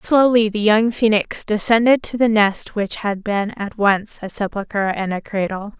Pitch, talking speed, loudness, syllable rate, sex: 210 Hz, 185 wpm, -18 LUFS, 4.4 syllables/s, female